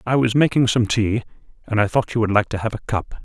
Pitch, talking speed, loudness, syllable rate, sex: 115 Hz, 280 wpm, -20 LUFS, 6.3 syllables/s, male